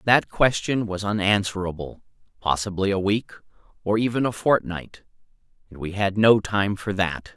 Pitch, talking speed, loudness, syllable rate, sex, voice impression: 100 Hz, 145 wpm, -23 LUFS, 4.8 syllables/s, male, masculine, middle-aged, tensed, powerful, fluent, calm, slightly mature, wild, lively, slightly strict, slightly sharp